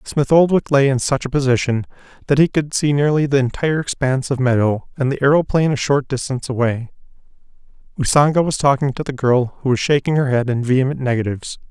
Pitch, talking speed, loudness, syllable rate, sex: 135 Hz, 195 wpm, -17 LUFS, 6.2 syllables/s, male